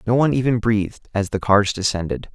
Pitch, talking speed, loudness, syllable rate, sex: 110 Hz, 205 wpm, -20 LUFS, 6.2 syllables/s, male